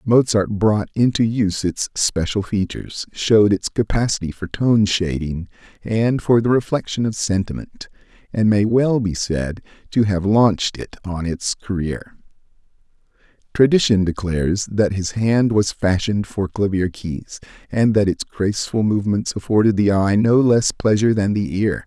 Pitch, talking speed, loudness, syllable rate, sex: 105 Hz, 150 wpm, -19 LUFS, 4.7 syllables/s, male